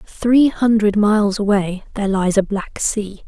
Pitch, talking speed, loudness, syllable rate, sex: 205 Hz, 165 wpm, -17 LUFS, 4.3 syllables/s, female